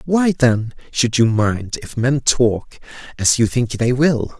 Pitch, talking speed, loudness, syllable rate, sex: 125 Hz, 175 wpm, -17 LUFS, 3.6 syllables/s, male